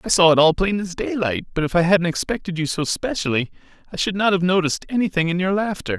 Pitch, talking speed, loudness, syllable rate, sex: 175 Hz, 240 wpm, -20 LUFS, 6.4 syllables/s, male